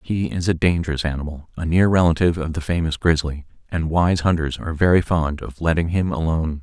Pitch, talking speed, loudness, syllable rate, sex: 80 Hz, 200 wpm, -20 LUFS, 5.9 syllables/s, male